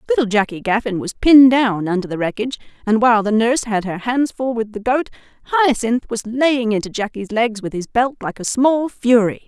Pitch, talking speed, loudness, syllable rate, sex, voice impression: 230 Hz, 210 wpm, -17 LUFS, 5.7 syllables/s, female, feminine, middle-aged, tensed, powerful, clear, intellectual, elegant, lively, strict, slightly intense, sharp